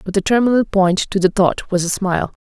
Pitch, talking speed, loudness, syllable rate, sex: 195 Hz, 245 wpm, -16 LUFS, 5.8 syllables/s, female